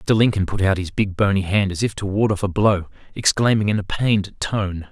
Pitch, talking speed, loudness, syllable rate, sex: 100 Hz, 245 wpm, -20 LUFS, 5.5 syllables/s, male